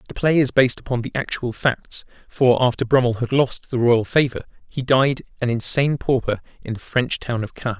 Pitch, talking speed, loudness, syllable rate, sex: 125 Hz, 210 wpm, -20 LUFS, 5.3 syllables/s, male